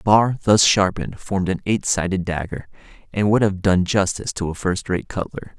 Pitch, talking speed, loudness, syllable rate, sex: 95 Hz, 205 wpm, -20 LUFS, 5.5 syllables/s, male